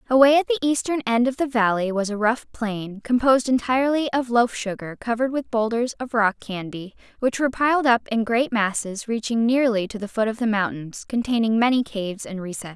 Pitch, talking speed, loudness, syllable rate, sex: 230 Hz, 200 wpm, -22 LUFS, 5.7 syllables/s, female